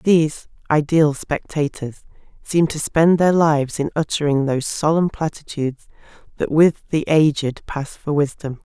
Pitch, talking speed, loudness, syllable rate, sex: 150 Hz, 140 wpm, -19 LUFS, 4.6 syllables/s, female